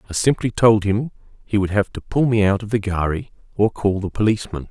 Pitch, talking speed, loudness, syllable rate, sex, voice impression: 105 Hz, 230 wpm, -20 LUFS, 5.8 syllables/s, male, masculine, adult-like, thick, tensed, slightly powerful, slightly hard, slightly raspy, cool, calm, mature, wild, lively, strict